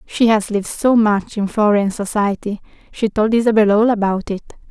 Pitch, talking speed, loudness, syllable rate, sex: 210 Hz, 180 wpm, -17 LUFS, 5.3 syllables/s, female